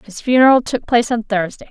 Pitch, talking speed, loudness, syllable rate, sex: 230 Hz, 210 wpm, -15 LUFS, 6.2 syllables/s, female